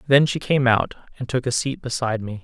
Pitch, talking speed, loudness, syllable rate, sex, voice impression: 125 Hz, 245 wpm, -21 LUFS, 5.8 syllables/s, male, masculine, adult-like, tensed, powerful, slightly bright, slightly muffled, slightly nasal, cool, intellectual, calm, slightly friendly, reassuring, kind, modest